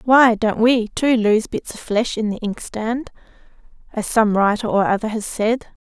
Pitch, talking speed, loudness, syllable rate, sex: 225 Hz, 185 wpm, -19 LUFS, 4.4 syllables/s, female